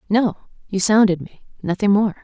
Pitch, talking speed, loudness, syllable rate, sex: 200 Hz, 160 wpm, -19 LUFS, 5.3 syllables/s, female